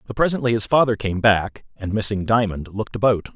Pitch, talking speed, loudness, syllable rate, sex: 105 Hz, 195 wpm, -20 LUFS, 5.9 syllables/s, male